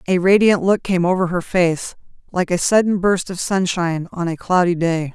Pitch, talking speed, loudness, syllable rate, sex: 180 Hz, 200 wpm, -18 LUFS, 5.0 syllables/s, female